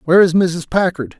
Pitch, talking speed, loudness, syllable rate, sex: 170 Hz, 200 wpm, -15 LUFS, 5.6 syllables/s, male